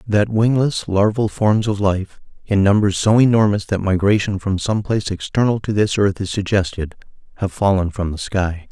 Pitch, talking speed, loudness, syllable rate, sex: 100 Hz, 180 wpm, -18 LUFS, 5.0 syllables/s, male